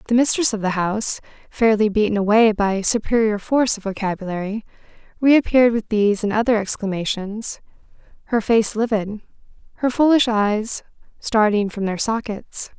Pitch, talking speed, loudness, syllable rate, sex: 215 Hz, 135 wpm, -19 LUFS, 5.2 syllables/s, female